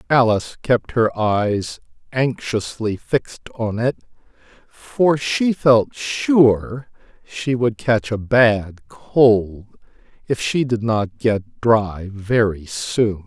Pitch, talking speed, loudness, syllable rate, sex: 115 Hz, 120 wpm, -19 LUFS, 2.9 syllables/s, male